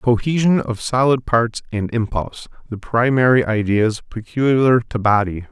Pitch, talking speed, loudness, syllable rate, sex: 115 Hz, 130 wpm, -18 LUFS, 4.6 syllables/s, male